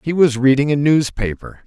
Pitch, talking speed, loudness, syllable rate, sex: 140 Hz, 180 wpm, -16 LUFS, 5.1 syllables/s, male